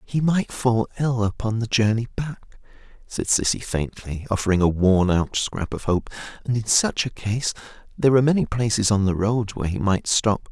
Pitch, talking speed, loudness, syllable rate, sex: 110 Hz, 195 wpm, -22 LUFS, 5.0 syllables/s, male